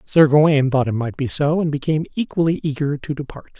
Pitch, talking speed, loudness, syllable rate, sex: 145 Hz, 215 wpm, -19 LUFS, 6.0 syllables/s, male